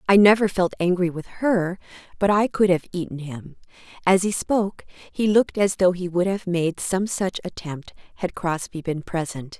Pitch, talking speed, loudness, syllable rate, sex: 180 Hz, 190 wpm, -22 LUFS, 4.8 syllables/s, female